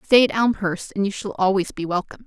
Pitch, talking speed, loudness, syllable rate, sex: 200 Hz, 240 wpm, -21 LUFS, 6.1 syllables/s, female